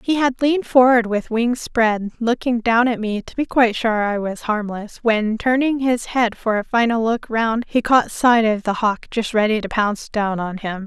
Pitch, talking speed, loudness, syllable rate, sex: 225 Hz, 220 wpm, -19 LUFS, 4.6 syllables/s, female